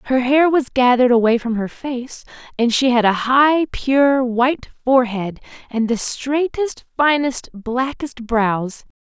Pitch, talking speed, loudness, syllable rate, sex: 255 Hz, 145 wpm, -17 LUFS, 4.0 syllables/s, female